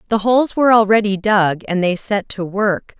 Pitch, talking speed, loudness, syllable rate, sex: 205 Hz, 200 wpm, -16 LUFS, 5.1 syllables/s, female